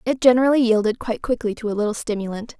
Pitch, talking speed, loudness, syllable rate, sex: 230 Hz, 210 wpm, -20 LUFS, 7.3 syllables/s, female